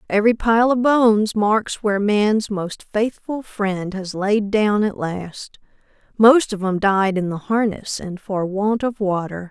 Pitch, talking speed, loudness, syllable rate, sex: 205 Hz, 170 wpm, -19 LUFS, 3.9 syllables/s, female